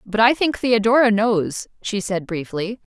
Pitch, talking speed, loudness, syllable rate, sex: 215 Hz, 165 wpm, -19 LUFS, 4.3 syllables/s, female